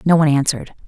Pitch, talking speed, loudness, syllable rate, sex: 150 Hz, 205 wpm, -16 LUFS, 8.7 syllables/s, female